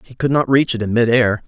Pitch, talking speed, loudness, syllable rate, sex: 120 Hz, 285 wpm, -16 LUFS, 5.9 syllables/s, male